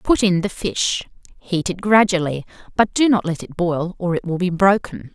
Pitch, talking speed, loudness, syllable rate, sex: 180 Hz, 210 wpm, -19 LUFS, 4.9 syllables/s, female